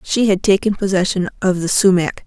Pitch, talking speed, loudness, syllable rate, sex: 190 Hz, 185 wpm, -16 LUFS, 5.4 syllables/s, female